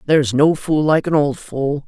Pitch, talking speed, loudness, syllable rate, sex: 150 Hz, 225 wpm, -17 LUFS, 4.7 syllables/s, female